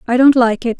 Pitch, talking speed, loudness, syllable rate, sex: 245 Hz, 305 wpm, -12 LUFS, 6.4 syllables/s, female